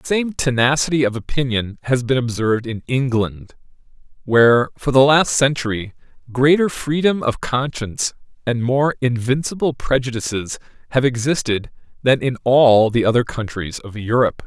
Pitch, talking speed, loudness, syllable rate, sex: 125 Hz, 135 wpm, -18 LUFS, 4.9 syllables/s, male